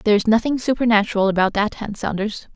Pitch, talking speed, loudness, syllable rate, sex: 215 Hz, 165 wpm, -19 LUFS, 6.3 syllables/s, female